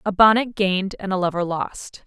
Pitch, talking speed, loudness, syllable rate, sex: 195 Hz, 205 wpm, -20 LUFS, 5.1 syllables/s, female